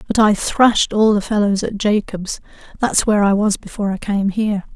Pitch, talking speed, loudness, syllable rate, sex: 205 Hz, 190 wpm, -17 LUFS, 5.6 syllables/s, female